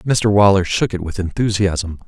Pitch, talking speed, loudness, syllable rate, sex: 100 Hz, 175 wpm, -17 LUFS, 4.5 syllables/s, male